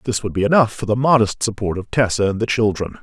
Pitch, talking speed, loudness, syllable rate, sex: 110 Hz, 260 wpm, -18 LUFS, 6.3 syllables/s, male